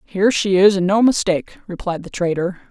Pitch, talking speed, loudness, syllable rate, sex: 190 Hz, 200 wpm, -17 LUFS, 5.8 syllables/s, female